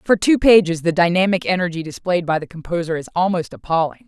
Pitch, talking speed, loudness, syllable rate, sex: 175 Hz, 190 wpm, -18 LUFS, 6.0 syllables/s, female